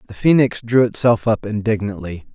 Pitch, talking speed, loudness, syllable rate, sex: 110 Hz, 155 wpm, -17 LUFS, 5.3 syllables/s, male